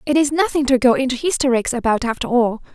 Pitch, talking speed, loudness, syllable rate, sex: 260 Hz, 220 wpm, -18 LUFS, 6.3 syllables/s, female